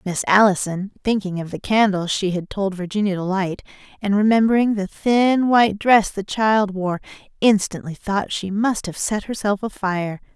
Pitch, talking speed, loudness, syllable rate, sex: 200 Hz, 170 wpm, -20 LUFS, 4.8 syllables/s, female